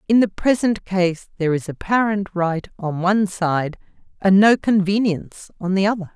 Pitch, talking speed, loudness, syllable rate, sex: 190 Hz, 165 wpm, -19 LUFS, 4.9 syllables/s, female